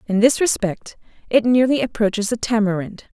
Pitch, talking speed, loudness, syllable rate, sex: 220 Hz, 150 wpm, -19 LUFS, 5.2 syllables/s, female